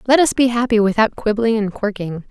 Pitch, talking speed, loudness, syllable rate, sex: 225 Hz, 210 wpm, -17 LUFS, 5.7 syllables/s, female